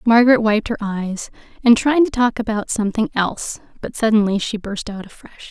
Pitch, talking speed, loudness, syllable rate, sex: 220 Hz, 185 wpm, -18 LUFS, 5.4 syllables/s, female